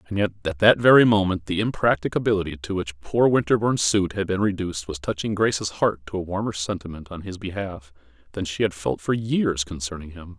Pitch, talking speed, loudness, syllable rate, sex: 95 Hz, 200 wpm, -23 LUFS, 5.9 syllables/s, male